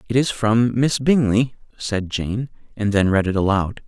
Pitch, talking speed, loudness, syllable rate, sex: 110 Hz, 185 wpm, -20 LUFS, 4.4 syllables/s, male